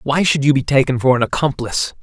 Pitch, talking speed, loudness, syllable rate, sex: 140 Hz, 235 wpm, -16 LUFS, 6.4 syllables/s, male